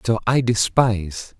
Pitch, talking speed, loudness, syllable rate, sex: 110 Hz, 130 wpm, -19 LUFS, 4.3 syllables/s, male